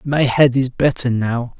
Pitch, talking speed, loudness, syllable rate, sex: 130 Hz, 190 wpm, -17 LUFS, 4.0 syllables/s, male